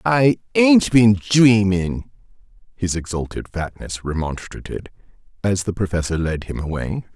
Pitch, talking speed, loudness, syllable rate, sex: 100 Hz, 115 wpm, -19 LUFS, 4.2 syllables/s, male